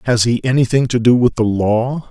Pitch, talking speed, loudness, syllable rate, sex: 120 Hz, 230 wpm, -15 LUFS, 5.1 syllables/s, male